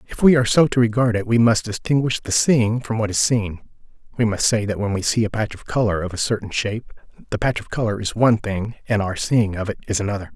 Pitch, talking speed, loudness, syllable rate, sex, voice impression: 110 Hz, 260 wpm, -20 LUFS, 6.3 syllables/s, male, very masculine, very adult-like, slightly old, very thick, slightly relaxed, powerful, bright, hard, clear, slightly fluent, slightly raspy, cool, very intellectual, slightly refreshing, very sincere, very calm, very mature, friendly, reassuring, very unique, elegant, wild, slightly sweet, lively, kind, slightly intense